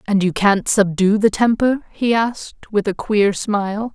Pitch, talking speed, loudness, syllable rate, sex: 210 Hz, 180 wpm, -17 LUFS, 4.2 syllables/s, female